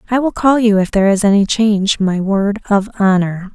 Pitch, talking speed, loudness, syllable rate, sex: 205 Hz, 220 wpm, -14 LUFS, 5.5 syllables/s, female